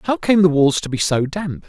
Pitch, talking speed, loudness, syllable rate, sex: 165 Hz, 285 wpm, -17 LUFS, 4.9 syllables/s, male